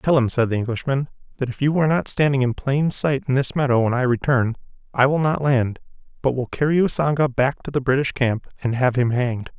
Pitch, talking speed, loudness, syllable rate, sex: 130 Hz, 230 wpm, -21 LUFS, 5.8 syllables/s, male